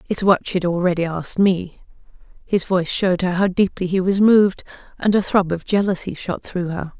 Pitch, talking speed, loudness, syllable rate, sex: 185 Hz, 195 wpm, -19 LUFS, 5.5 syllables/s, female